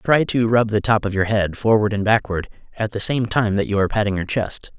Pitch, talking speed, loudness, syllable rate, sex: 105 Hz, 265 wpm, -19 LUFS, 5.7 syllables/s, male